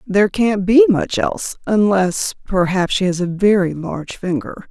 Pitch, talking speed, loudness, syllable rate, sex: 195 Hz, 155 wpm, -17 LUFS, 4.6 syllables/s, female